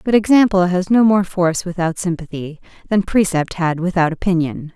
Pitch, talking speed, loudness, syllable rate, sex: 180 Hz, 165 wpm, -17 LUFS, 5.3 syllables/s, female